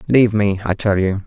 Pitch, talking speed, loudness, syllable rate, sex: 105 Hz, 235 wpm, -17 LUFS, 5.7 syllables/s, male